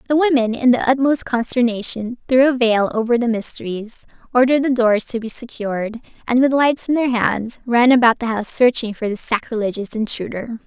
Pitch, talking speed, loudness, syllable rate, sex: 235 Hz, 185 wpm, -18 LUFS, 5.4 syllables/s, female